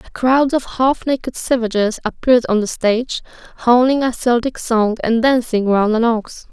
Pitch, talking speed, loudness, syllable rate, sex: 235 Hz, 175 wpm, -16 LUFS, 4.8 syllables/s, female